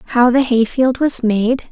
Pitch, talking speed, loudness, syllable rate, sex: 245 Hz, 210 wpm, -15 LUFS, 3.7 syllables/s, female